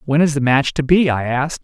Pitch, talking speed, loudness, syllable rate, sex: 145 Hz, 295 wpm, -16 LUFS, 6.0 syllables/s, male